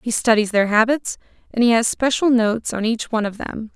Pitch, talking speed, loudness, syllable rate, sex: 230 Hz, 225 wpm, -19 LUFS, 5.7 syllables/s, female